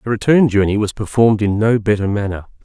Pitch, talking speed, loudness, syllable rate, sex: 105 Hz, 205 wpm, -16 LUFS, 6.3 syllables/s, male